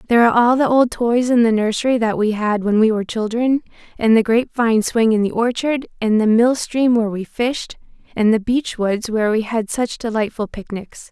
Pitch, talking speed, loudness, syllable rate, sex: 225 Hz, 220 wpm, -17 LUFS, 5.4 syllables/s, female